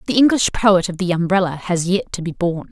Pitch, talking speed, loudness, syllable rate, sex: 180 Hz, 245 wpm, -18 LUFS, 5.6 syllables/s, female